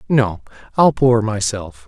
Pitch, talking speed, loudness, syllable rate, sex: 115 Hz, 130 wpm, -17 LUFS, 3.7 syllables/s, male